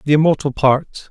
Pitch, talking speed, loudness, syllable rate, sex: 145 Hz, 160 wpm, -16 LUFS, 5.2 syllables/s, male